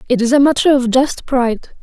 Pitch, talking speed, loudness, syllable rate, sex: 255 Hz, 230 wpm, -14 LUFS, 6.3 syllables/s, female